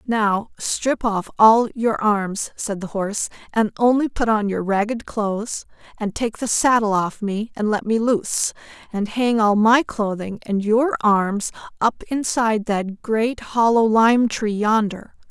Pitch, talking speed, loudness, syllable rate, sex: 215 Hz, 165 wpm, -20 LUFS, 4.0 syllables/s, female